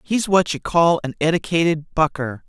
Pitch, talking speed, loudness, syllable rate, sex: 160 Hz, 170 wpm, -19 LUFS, 4.9 syllables/s, male